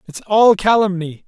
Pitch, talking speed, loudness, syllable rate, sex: 195 Hz, 140 wpm, -14 LUFS, 4.8 syllables/s, male